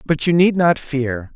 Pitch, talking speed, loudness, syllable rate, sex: 150 Hz, 220 wpm, -17 LUFS, 4.0 syllables/s, male